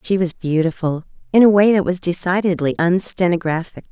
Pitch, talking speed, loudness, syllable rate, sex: 180 Hz, 155 wpm, -17 LUFS, 5.4 syllables/s, female